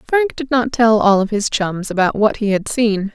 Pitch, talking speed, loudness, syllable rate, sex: 220 Hz, 250 wpm, -16 LUFS, 4.7 syllables/s, female